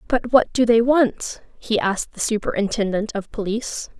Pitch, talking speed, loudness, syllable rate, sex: 225 Hz, 165 wpm, -21 LUFS, 5.0 syllables/s, female